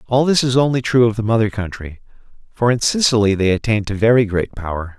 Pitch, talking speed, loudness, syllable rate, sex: 110 Hz, 215 wpm, -17 LUFS, 6.3 syllables/s, male